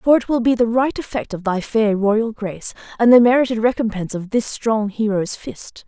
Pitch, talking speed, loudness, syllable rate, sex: 220 Hz, 215 wpm, -18 LUFS, 5.2 syllables/s, female